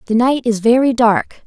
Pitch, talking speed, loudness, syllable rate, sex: 235 Hz, 205 wpm, -14 LUFS, 4.8 syllables/s, female